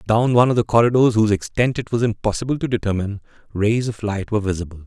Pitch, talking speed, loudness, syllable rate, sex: 110 Hz, 210 wpm, -19 LUFS, 7.1 syllables/s, male